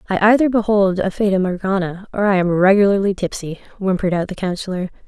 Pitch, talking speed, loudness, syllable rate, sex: 190 Hz, 175 wpm, -18 LUFS, 6.3 syllables/s, female